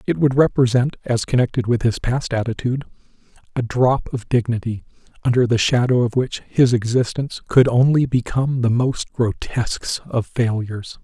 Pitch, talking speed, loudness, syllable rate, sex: 120 Hz, 150 wpm, -19 LUFS, 5.1 syllables/s, male